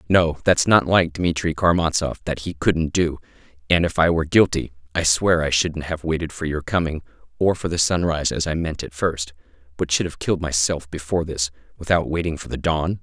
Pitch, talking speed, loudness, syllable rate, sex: 80 Hz, 205 wpm, -21 LUFS, 5.6 syllables/s, male